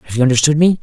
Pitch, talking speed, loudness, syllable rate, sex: 140 Hz, 290 wpm, -13 LUFS, 7.6 syllables/s, male